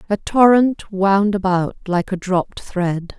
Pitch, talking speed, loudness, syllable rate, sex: 195 Hz, 150 wpm, -18 LUFS, 3.8 syllables/s, female